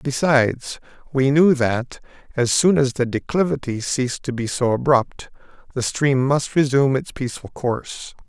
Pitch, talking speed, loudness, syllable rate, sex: 135 Hz, 150 wpm, -20 LUFS, 4.7 syllables/s, male